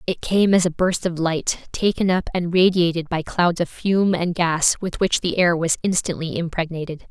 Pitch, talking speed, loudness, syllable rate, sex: 175 Hz, 205 wpm, -20 LUFS, 4.8 syllables/s, female